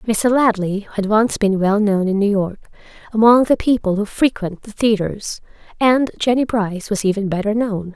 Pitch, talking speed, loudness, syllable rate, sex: 210 Hz, 180 wpm, -17 LUFS, 4.8 syllables/s, female